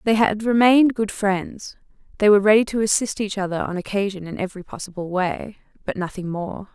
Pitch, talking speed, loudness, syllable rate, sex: 200 Hz, 185 wpm, -21 LUFS, 5.8 syllables/s, female